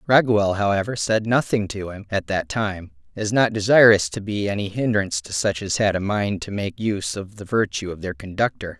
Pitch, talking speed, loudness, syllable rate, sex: 105 Hz, 210 wpm, -21 LUFS, 5.4 syllables/s, male